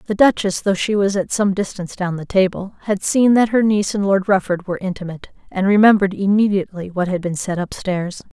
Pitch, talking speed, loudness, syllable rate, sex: 195 Hz, 215 wpm, -18 LUFS, 5.9 syllables/s, female